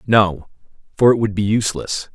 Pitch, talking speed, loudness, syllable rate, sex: 110 Hz, 170 wpm, -18 LUFS, 5.2 syllables/s, male